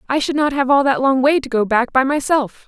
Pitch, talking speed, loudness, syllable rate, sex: 265 Hz, 290 wpm, -16 LUFS, 5.6 syllables/s, female